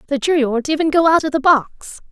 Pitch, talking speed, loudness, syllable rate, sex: 290 Hz, 255 wpm, -16 LUFS, 6.0 syllables/s, female